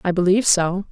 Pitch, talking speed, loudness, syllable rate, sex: 185 Hz, 195 wpm, -17 LUFS, 6.3 syllables/s, female